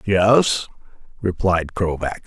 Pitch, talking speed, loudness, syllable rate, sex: 95 Hz, 80 wpm, -19 LUFS, 3.1 syllables/s, male